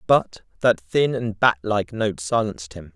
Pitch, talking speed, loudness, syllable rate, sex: 105 Hz, 185 wpm, -22 LUFS, 4.3 syllables/s, male